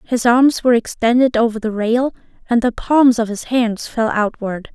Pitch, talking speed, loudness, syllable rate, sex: 235 Hz, 190 wpm, -16 LUFS, 4.8 syllables/s, female